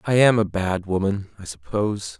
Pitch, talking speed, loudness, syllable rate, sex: 100 Hz, 190 wpm, -22 LUFS, 5.0 syllables/s, male